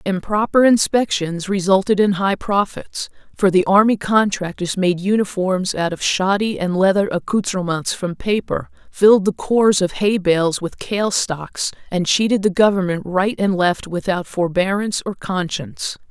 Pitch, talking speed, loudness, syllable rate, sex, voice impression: 190 Hz, 150 wpm, -18 LUFS, 4.5 syllables/s, female, feminine, adult-like, slightly powerful, slightly hard, fluent, intellectual, calm, slightly reassuring, elegant, strict, sharp